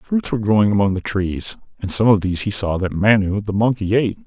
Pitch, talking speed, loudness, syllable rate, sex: 105 Hz, 240 wpm, -18 LUFS, 6.1 syllables/s, male